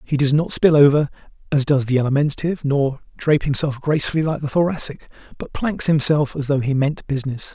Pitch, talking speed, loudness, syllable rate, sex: 145 Hz, 190 wpm, -19 LUFS, 6.0 syllables/s, male